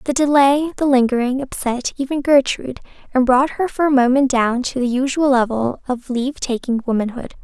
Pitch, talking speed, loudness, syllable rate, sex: 260 Hz, 175 wpm, -18 LUFS, 5.3 syllables/s, female